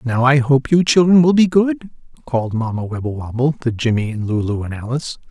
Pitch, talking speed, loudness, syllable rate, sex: 135 Hz, 190 wpm, -17 LUFS, 5.7 syllables/s, male